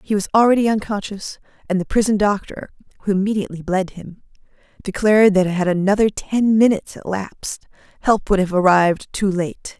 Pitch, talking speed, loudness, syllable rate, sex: 200 Hz, 155 wpm, -18 LUFS, 5.6 syllables/s, female